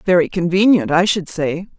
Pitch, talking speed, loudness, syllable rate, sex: 175 Hz, 170 wpm, -16 LUFS, 5.0 syllables/s, female